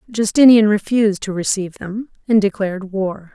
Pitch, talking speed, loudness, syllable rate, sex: 205 Hz, 145 wpm, -16 LUFS, 5.4 syllables/s, female